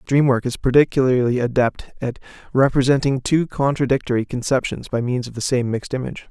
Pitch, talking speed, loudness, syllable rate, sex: 130 Hz, 170 wpm, -20 LUFS, 6.0 syllables/s, male